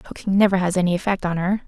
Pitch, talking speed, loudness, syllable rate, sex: 185 Hz, 250 wpm, -20 LUFS, 7.5 syllables/s, female